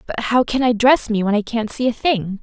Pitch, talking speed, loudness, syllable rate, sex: 230 Hz, 295 wpm, -18 LUFS, 5.2 syllables/s, female